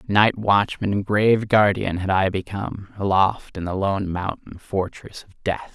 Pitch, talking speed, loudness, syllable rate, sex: 100 Hz, 165 wpm, -22 LUFS, 4.4 syllables/s, male